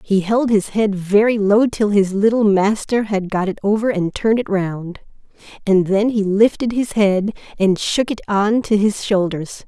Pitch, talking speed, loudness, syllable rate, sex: 205 Hz, 190 wpm, -17 LUFS, 4.4 syllables/s, female